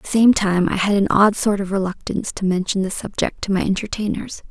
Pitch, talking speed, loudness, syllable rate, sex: 200 Hz, 240 wpm, -19 LUFS, 6.0 syllables/s, female